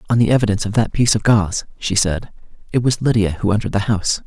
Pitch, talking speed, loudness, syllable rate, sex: 105 Hz, 240 wpm, -18 LUFS, 7.4 syllables/s, male